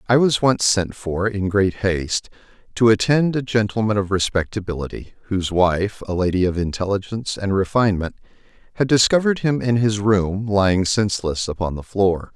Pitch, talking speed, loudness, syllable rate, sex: 100 Hz, 160 wpm, -20 LUFS, 5.4 syllables/s, male